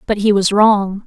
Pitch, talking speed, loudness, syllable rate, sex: 205 Hz, 225 wpm, -14 LUFS, 4.3 syllables/s, female